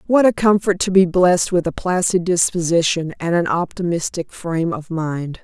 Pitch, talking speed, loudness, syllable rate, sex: 175 Hz, 175 wpm, -18 LUFS, 5.0 syllables/s, female